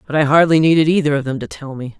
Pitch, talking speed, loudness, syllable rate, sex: 150 Hz, 300 wpm, -15 LUFS, 7.0 syllables/s, female